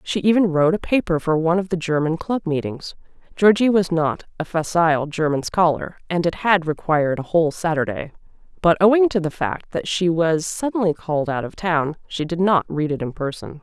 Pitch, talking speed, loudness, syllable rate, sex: 170 Hz, 205 wpm, -20 LUFS, 5.1 syllables/s, female